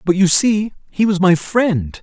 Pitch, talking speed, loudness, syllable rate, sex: 190 Hz, 205 wpm, -15 LUFS, 4.0 syllables/s, male